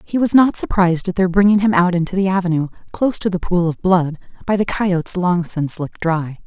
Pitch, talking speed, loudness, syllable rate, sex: 180 Hz, 215 wpm, -17 LUFS, 6.0 syllables/s, female